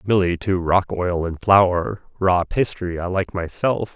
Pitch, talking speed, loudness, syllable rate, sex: 95 Hz, 165 wpm, -20 LUFS, 4.0 syllables/s, male